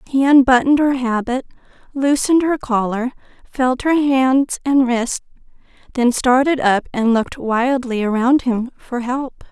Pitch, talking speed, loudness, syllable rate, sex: 255 Hz, 140 wpm, -17 LUFS, 4.2 syllables/s, female